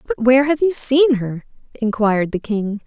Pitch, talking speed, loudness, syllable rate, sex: 245 Hz, 190 wpm, -17 LUFS, 4.9 syllables/s, female